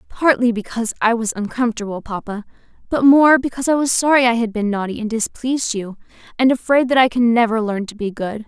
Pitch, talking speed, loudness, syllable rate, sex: 235 Hz, 205 wpm, -17 LUFS, 6.2 syllables/s, female